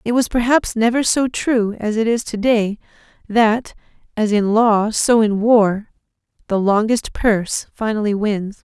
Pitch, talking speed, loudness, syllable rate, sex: 220 Hz, 150 wpm, -17 LUFS, 4.1 syllables/s, female